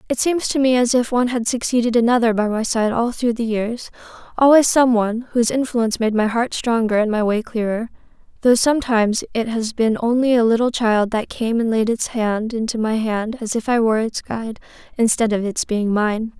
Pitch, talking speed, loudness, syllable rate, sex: 230 Hz, 210 wpm, -18 LUFS, 5.5 syllables/s, female